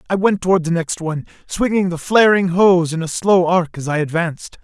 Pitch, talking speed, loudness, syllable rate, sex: 175 Hz, 220 wpm, -16 LUFS, 5.5 syllables/s, male